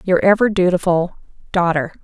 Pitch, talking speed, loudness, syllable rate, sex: 180 Hz, 120 wpm, -17 LUFS, 5.2 syllables/s, female